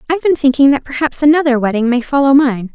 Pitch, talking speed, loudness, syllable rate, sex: 270 Hz, 220 wpm, -13 LUFS, 6.7 syllables/s, female